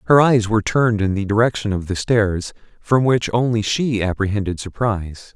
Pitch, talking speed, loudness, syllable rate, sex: 105 Hz, 180 wpm, -19 LUFS, 5.3 syllables/s, male